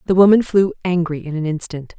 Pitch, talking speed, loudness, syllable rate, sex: 175 Hz, 210 wpm, -17 LUFS, 5.9 syllables/s, female